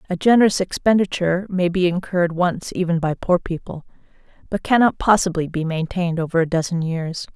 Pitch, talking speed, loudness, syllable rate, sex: 175 Hz, 165 wpm, -20 LUFS, 5.8 syllables/s, female